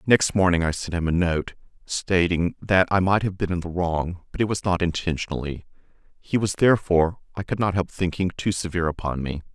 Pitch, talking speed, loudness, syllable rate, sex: 90 Hz, 205 wpm, -23 LUFS, 5.6 syllables/s, male